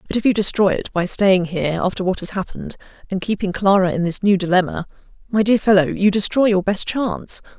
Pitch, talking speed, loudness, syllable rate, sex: 195 Hz, 205 wpm, -18 LUFS, 6.0 syllables/s, female